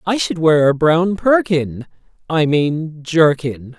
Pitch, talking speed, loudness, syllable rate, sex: 160 Hz, 125 wpm, -16 LUFS, 3.4 syllables/s, male